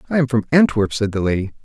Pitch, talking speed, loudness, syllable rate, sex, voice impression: 115 Hz, 255 wpm, -18 LUFS, 6.9 syllables/s, male, masculine, very adult-like, slightly soft, slightly cool, slightly calm, friendly, kind